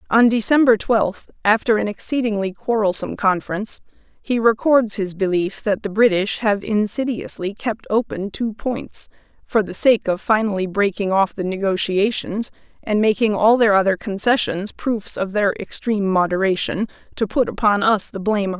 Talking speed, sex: 160 wpm, female